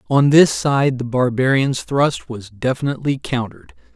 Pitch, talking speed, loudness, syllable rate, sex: 130 Hz, 135 wpm, -17 LUFS, 4.7 syllables/s, male